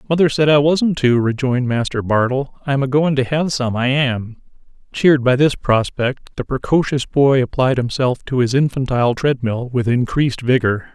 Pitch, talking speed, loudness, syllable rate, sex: 130 Hz, 175 wpm, -17 LUFS, 5.0 syllables/s, male